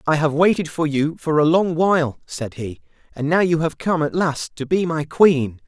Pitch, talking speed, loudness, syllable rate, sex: 155 Hz, 235 wpm, -19 LUFS, 4.7 syllables/s, male